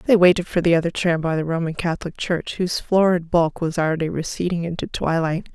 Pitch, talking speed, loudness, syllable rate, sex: 170 Hz, 205 wpm, -21 LUFS, 6.0 syllables/s, female